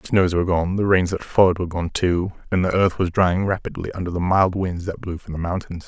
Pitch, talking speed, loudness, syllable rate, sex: 90 Hz, 265 wpm, -21 LUFS, 6.0 syllables/s, male